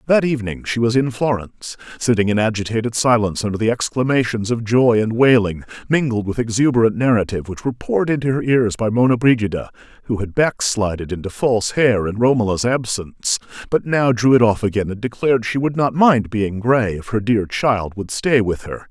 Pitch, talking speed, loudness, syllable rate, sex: 115 Hz, 195 wpm, -18 LUFS, 5.7 syllables/s, male